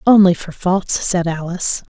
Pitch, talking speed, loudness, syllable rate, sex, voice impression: 180 Hz, 155 wpm, -17 LUFS, 4.6 syllables/s, female, very feminine, adult-like, friendly, reassuring, kind